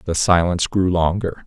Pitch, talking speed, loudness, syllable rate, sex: 90 Hz, 165 wpm, -18 LUFS, 4.9 syllables/s, male